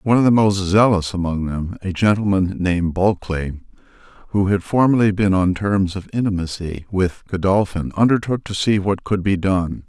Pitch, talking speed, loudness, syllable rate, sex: 95 Hz, 170 wpm, -19 LUFS, 5.1 syllables/s, male